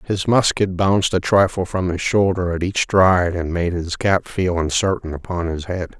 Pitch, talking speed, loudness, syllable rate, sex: 90 Hz, 200 wpm, -19 LUFS, 4.8 syllables/s, male